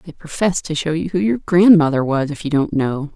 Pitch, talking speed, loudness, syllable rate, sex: 165 Hz, 245 wpm, -17 LUFS, 5.3 syllables/s, female